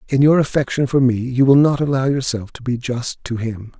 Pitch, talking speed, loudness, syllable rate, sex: 130 Hz, 235 wpm, -18 LUFS, 5.4 syllables/s, male